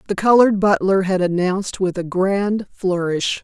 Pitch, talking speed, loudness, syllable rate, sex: 190 Hz, 155 wpm, -18 LUFS, 4.7 syllables/s, female